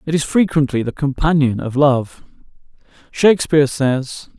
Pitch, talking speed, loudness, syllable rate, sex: 145 Hz, 125 wpm, -16 LUFS, 4.5 syllables/s, male